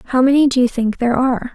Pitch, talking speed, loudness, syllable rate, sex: 250 Hz, 275 wpm, -15 LUFS, 6.6 syllables/s, female